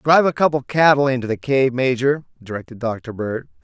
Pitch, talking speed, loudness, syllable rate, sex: 130 Hz, 200 wpm, -19 LUFS, 5.7 syllables/s, male